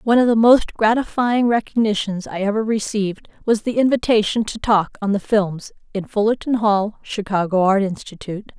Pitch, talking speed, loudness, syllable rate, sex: 215 Hz, 160 wpm, -19 LUFS, 5.3 syllables/s, female